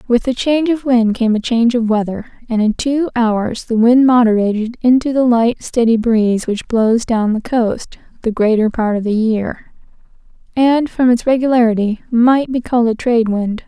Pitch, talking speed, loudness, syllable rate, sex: 235 Hz, 190 wpm, -15 LUFS, 4.9 syllables/s, female